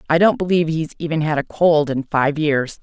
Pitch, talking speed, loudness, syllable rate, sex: 160 Hz, 235 wpm, -18 LUFS, 5.5 syllables/s, female